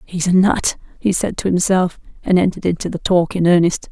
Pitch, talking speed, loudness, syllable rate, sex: 180 Hz, 215 wpm, -17 LUFS, 5.6 syllables/s, female